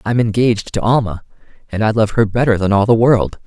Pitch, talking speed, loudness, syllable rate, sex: 110 Hz, 225 wpm, -15 LUFS, 6.0 syllables/s, male